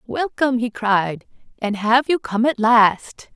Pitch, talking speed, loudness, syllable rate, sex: 235 Hz, 160 wpm, -18 LUFS, 3.7 syllables/s, female